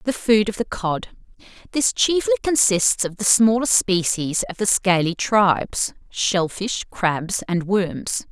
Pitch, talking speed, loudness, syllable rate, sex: 200 Hz, 145 wpm, -20 LUFS, 3.7 syllables/s, female